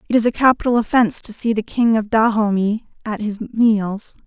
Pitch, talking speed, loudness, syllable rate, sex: 220 Hz, 195 wpm, -18 LUFS, 5.4 syllables/s, female